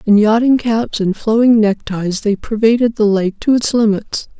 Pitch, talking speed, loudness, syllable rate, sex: 220 Hz, 180 wpm, -14 LUFS, 4.5 syllables/s, female